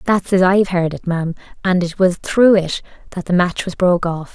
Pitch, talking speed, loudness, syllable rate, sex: 180 Hz, 235 wpm, -17 LUFS, 5.6 syllables/s, female